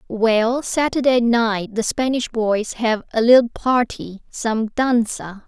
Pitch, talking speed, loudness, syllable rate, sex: 230 Hz, 130 wpm, -19 LUFS, 3.3 syllables/s, female